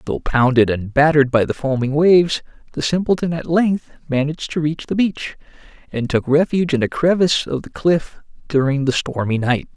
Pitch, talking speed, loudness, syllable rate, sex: 150 Hz, 185 wpm, -18 LUFS, 5.4 syllables/s, male